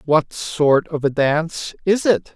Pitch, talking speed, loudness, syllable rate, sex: 160 Hz, 180 wpm, -19 LUFS, 3.8 syllables/s, male